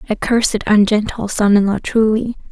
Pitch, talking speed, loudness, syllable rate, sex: 215 Hz, 165 wpm, -15 LUFS, 5.2 syllables/s, female